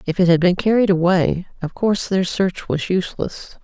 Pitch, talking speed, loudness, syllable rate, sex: 180 Hz, 200 wpm, -19 LUFS, 5.2 syllables/s, female